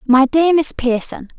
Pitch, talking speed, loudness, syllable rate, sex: 275 Hz, 175 wpm, -15 LUFS, 4.3 syllables/s, female